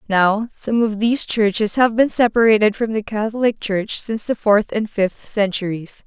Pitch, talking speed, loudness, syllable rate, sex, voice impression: 215 Hz, 180 wpm, -18 LUFS, 4.8 syllables/s, female, feminine, slightly gender-neutral, slightly young, tensed, powerful, slightly bright, clear, fluent, intellectual, slightly friendly, unique, lively